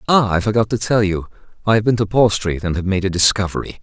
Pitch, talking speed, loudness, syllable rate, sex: 100 Hz, 250 wpm, -17 LUFS, 6.1 syllables/s, male